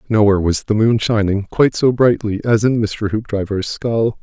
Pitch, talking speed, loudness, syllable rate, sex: 110 Hz, 185 wpm, -16 LUFS, 5.1 syllables/s, male